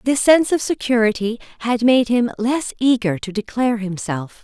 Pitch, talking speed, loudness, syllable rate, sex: 235 Hz, 160 wpm, -18 LUFS, 5.1 syllables/s, female